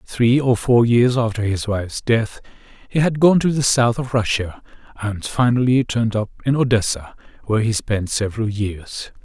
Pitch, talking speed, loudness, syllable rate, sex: 115 Hz, 175 wpm, -19 LUFS, 4.9 syllables/s, male